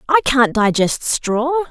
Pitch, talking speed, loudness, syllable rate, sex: 260 Hz, 140 wpm, -16 LUFS, 4.0 syllables/s, female